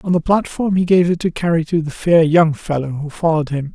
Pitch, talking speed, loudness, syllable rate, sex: 165 Hz, 255 wpm, -16 LUFS, 5.8 syllables/s, male